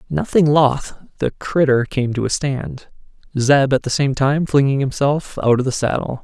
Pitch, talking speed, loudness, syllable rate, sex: 135 Hz, 185 wpm, -18 LUFS, 4.5 syllables/s, male